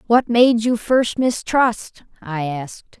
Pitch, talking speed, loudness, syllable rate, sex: 225 Hz, 140 wpm, -18 LUFS, 3.4 syllables/s, female